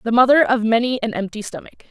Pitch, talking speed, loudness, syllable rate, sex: 230 Hz, 220 wpm, -17 LUFS, 6.7 syllables/s, female